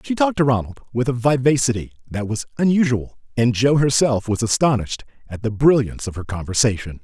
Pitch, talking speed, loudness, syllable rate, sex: 120 Hz, 180 wpm, -19 LUFS, 6.0 syllables/s, male